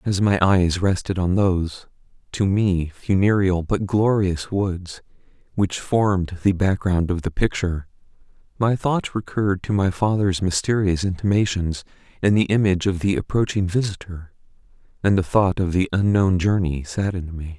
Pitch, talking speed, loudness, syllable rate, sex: 95 Hz, 145 wpm, -21 LUFS, 4.8 syllables/s, male